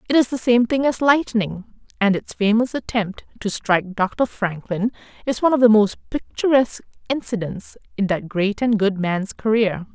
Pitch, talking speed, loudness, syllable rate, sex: 220 Hz, 175 wpm, -20 LUFS, 4.9 syllables/s, female